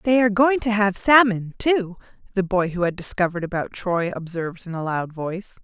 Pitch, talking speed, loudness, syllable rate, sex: 195 Hz, 200 wpm, -21 LUFS, 5.6 syllables/s, female